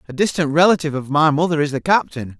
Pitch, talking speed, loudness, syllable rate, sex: 155 Hz, 225 wpm, -17 LUFS, 6.8 syllables/s, male